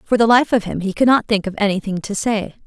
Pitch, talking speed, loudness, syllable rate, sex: 215 Hz, 295 wpm, -17 LUFS, 6.1 syllables/s, female